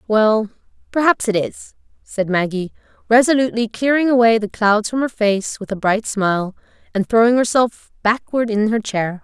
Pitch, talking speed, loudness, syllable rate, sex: 220 Hz, 160 wpm, -17 LUFS, 4.9 syllables/s, female